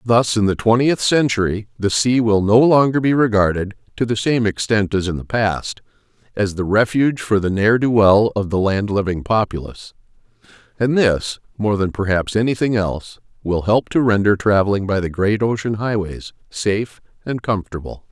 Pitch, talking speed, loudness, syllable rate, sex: 105 Hz, 175 wpm, -18 LUFS, 5.2 syllables/s, male